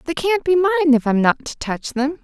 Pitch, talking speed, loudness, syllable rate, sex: 300 Hz, 270 wpm, -18 LUFS, 5.2 syllables/s, female